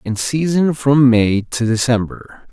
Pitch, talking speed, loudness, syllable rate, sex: 125 Hz, 145 wpm, -15 LUFS, 3.8 syllables/s, male